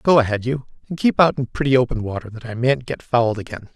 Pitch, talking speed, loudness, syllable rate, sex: 125 Hz, 255 wpm, -20 LUFS, 6.3 syllables/s, male